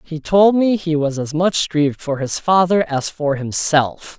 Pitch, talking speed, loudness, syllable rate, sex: 160 Hz, 200 wpm, -17 LUFS, 4.2 syllables/s, male